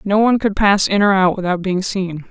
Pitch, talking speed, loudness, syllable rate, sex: 195 Hz, 260 wpm, -16 LUFS, 5.6 syllables/s, female